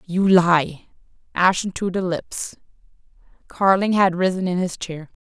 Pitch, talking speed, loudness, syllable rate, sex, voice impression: 180 Hz, 140 wpm, -20 LUFS, 4.1 syllables/s, female, very feminine, very adult-like, slightly middle-aged, slightly thin, tensed, slightly powerful, bright, hard, clear, fluent, slightly raspy, cool, intellectual, refreshing, sincere, calm, very friendly, very reassuring, slightly unique, slightly elegant, slightly wild, slightly sweet, slightly lively, strict, slightly intense